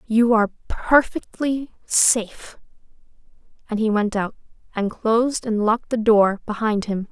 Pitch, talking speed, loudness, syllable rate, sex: 220 Hz, 135 wpm, -20 LUFS, 4.4 syllables/s, female